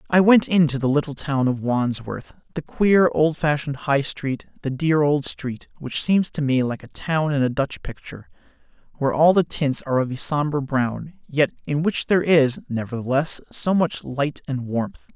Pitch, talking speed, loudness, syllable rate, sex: 145 Hz, 190 wpm, -21 LUFS, 4.8 syllables/s, male